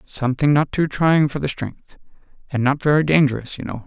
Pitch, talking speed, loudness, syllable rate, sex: 140 Hz, 200 wpm, -19 LUFS, 5.5 syllables/s, male